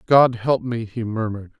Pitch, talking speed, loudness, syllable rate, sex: 115 Hz, 190 wpm, -21 LUFS, 4.9 syllables/s, male